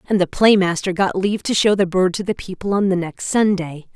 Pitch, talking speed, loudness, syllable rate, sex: 190 Hz, 260 wpm, -18 LUFS, 5.7 syllables/s, female